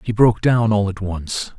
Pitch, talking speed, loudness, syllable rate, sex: 105 Hz, 225 wpm, -18 LUFS, 4.7 syllables/s, male